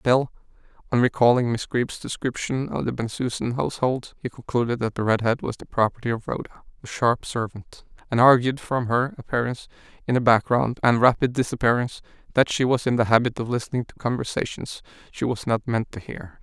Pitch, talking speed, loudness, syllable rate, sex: 120 Hz, 185 wpm, -23 LUFS, 5.7 syllables/s, male